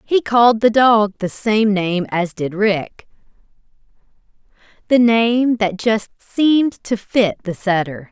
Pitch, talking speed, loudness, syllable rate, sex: 215 Hz, 135 wpm, -16 LUFS, 3.7 syllables/s, female